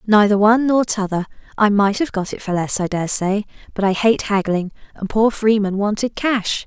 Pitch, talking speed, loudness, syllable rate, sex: 210 Hz, 205 wpm, -18 LUFS, 5.1 syllables/s, female